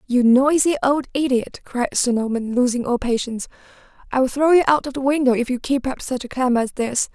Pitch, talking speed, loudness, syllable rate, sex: 260 Hz, 225 wpm, -19 LUFS, 5.8 syllables/s, female